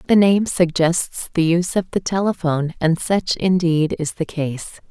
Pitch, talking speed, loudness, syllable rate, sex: 170 Hz, 170 wpm, -19 LUFS, 4.4 syllables/s, female